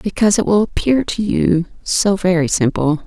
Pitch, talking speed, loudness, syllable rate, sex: 190 Hz, 175 wpm, -16 LUFS, 4.9 syllables/s, female